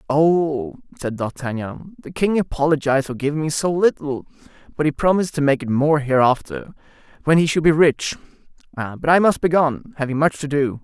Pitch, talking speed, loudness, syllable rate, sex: 150 Hz, 185 wpm, -19 LUFS, 5.2 syllables/s, male